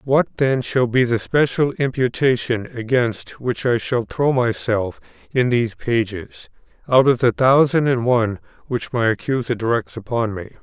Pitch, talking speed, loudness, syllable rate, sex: 120 Hz, 160 wpm, -19 LUFS, 4.6 syllables/s, male